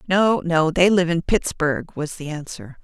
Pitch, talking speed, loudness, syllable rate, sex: 165 Hz, 190 wpm, -20 LUFS, 4.2 syllables/s, female